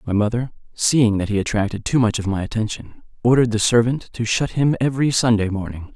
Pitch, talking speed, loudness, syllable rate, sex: 115 Hz, 200 wpm, -19 LUFS, 6.0 syllables/s, male